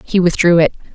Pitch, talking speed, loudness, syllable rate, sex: 175 Hz, 190 wpm, -13 LUFS, 6.4 syllables/s, female